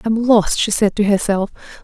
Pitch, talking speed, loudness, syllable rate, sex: 210 Hz, 230 wpm, -16 LUFS, 5.5 syllables/s, female